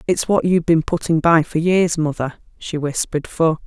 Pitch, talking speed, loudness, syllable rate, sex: 160 Hz, 195 wpm, -18 LUFS, 5.2 syllables/s, female